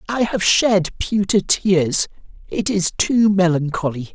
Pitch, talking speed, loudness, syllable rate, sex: 190 Hz, 130 wpm, -18 LUFS, 3.6 syllables/s, male